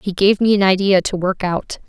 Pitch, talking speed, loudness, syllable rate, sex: 190 Hz, 255 wpm, -16 LUFS, 5.2 syllables/s, female